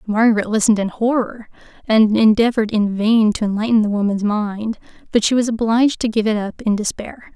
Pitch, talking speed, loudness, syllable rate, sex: 220 Hz, 190 wpm, -17 LUFS, 5.6 syllables/s, female